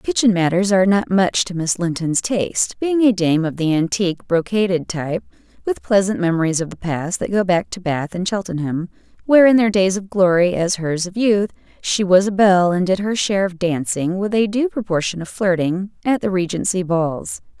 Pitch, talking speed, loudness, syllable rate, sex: 190 Hz, 205 wpm, -18 LUFS, 5.3 syllables/s, female